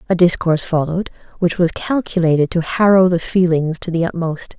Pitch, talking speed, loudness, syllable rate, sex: 170 Hz, 170 wpm, -16 LUFS, 5.6 syllables/s, female